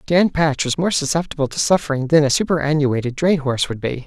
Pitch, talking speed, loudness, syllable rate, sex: 150 Hz, 205 wpm, -18 LUFS, 6.1 syllables/s, male